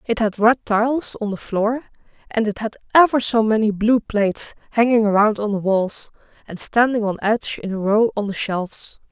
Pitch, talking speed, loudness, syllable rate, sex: 220 Hz, 195 wpm, -19 LUFS, 5.2 syllables/s, female